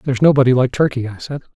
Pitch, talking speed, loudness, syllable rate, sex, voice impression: 130 Hz, 230 wpm, -15 LUFS, 7.5 syllables/s, male, masculine, middle-aged, relaxed, slightly weak, slightly muffled, raspy, intellectual, calm, slightly friendly, reassuring, slightly wild, kind, slightly modest